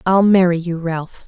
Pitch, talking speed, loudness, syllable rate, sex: 175 Hz, 190 wpm, -16 LUFS, 4.4 syllables/s, female